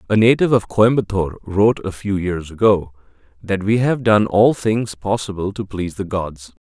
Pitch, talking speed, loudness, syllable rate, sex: 100 Hz, 180 wpm, -18 LUFS, 5.2 syllables/s, male